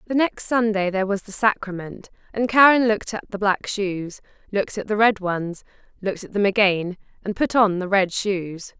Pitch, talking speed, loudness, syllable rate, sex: 200 Hz, 190 wpm, -21 LUFS, 5.2 syllables/s, female